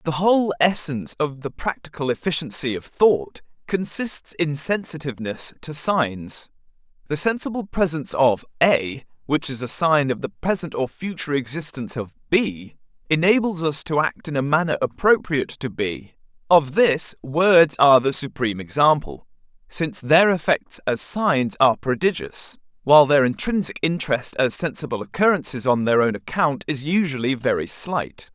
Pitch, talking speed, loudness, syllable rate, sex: 150 Hz, 150 wpm, -21 LUFS, 4.9 syllables/s, male